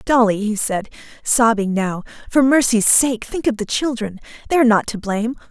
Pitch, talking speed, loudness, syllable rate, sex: 230 Hz, 185 wpm, -17 LUFS, 5.3 syllables/s, female